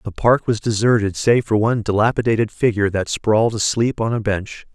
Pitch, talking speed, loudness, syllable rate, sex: 110 Hz, 190 wpm, -18 LUFS, 5.7 syllables/s, male